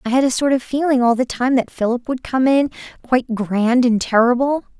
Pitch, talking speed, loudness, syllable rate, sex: 250 Hz, 225 wpm, -17 LUFS, 5.4 syllables/s, female